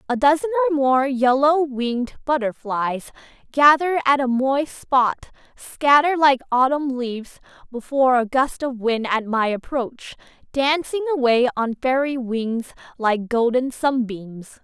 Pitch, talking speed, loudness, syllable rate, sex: 260 Hz, 130 wpm, -20 LUFS, 4.2 syllables/s, female